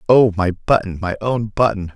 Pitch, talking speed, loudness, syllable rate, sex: 105 Hz, 185 wpm, -18 LUFS, 4.9 syllables/s, male